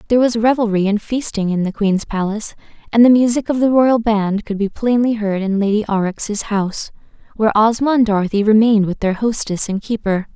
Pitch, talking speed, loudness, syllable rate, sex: 215 Hz, 195 wpm, -16 LUFS, 5.7 syllables/s, female